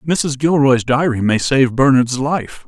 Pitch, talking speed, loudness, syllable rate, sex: 135 Hz, 155 wpm, -15 LUFS, 3.9 syllables/s, male